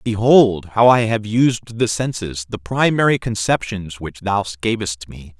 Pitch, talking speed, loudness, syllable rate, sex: 110 Hz, 155 wpm, -18 LUFS, 4.1 syllables/s, male